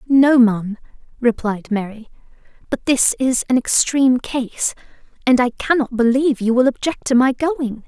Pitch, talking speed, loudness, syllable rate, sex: 250 Hz, 160 wpm, -17 LUFS, 4.8 syllables/s, female